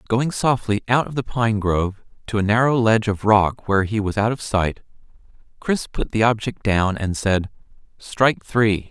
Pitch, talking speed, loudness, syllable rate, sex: 110 Hz, 190 wpm, -20 LUFS, 4.9 syllables/s, male